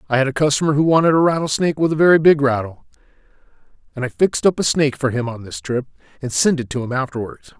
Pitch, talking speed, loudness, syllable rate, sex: 140 Hz, 235 wpm, -18 LUFS, 7.1 syllables/s, male